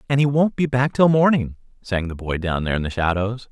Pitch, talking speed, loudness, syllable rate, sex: 115 Hz, 255 wpm, -20 LUFS, 5.8 syllables/s, male